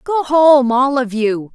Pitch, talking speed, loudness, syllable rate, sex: 265 Hz, 195 wpm, -14 LUFS, 3.5 syllables/s, female